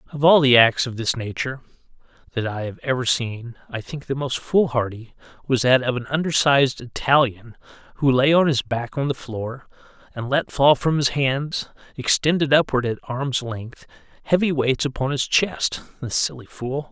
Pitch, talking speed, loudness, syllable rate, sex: 130 Hz, 175 wpm, -21 LUFS, 4.8 syllables/s, male